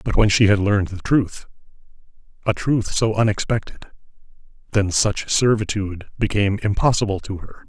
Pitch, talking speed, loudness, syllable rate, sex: 105 Hz, 125 wpm, -20 LUFS, 5.5 syllables/s, male